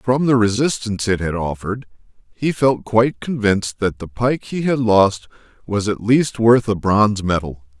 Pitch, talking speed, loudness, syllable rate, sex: 110 Hz, 175 wpm, -18 LUFS, 4.8 syllables/s, male